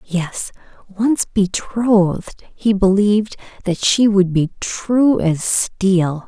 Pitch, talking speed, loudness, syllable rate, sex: 200 Hz, 115 wpm, -17 LUFS, 3.0 syllables/s, female